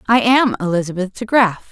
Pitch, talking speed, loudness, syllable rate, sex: 215 Hz, 140 wpm, -16 LUFS, 5.7 syllables/s, female